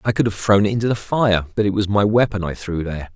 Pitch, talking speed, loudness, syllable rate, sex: 100 Hz, 305 wpm, -19 LUFS, 6.4 syllables/s, male